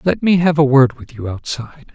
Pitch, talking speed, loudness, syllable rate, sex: 145 Hz, 245 wpm, -16 LUFS, 5.4 syllables/s, male